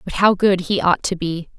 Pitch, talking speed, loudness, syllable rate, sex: 185 Hz, 265 wpm, -18 LUFS, 4.9 syllables/s, female